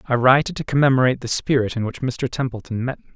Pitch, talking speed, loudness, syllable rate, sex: 130 Hz, 245 wpm, -20 LUFS, 7.1 syllables/s, male